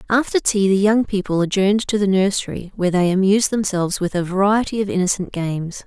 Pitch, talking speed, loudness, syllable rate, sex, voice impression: 195 Hz, 195 wpm, -18 LUFS, 6.2 syllables/s, female, feminine, slightly young, tensed, clear, fluent, slightly intellectual, slightly friendly, slightly elegant, slightly sweet, slightly sharp